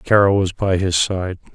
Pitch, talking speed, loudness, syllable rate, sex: 95 Hz, 195 wpm, -18 LUFS, 4.6 syllables/s, male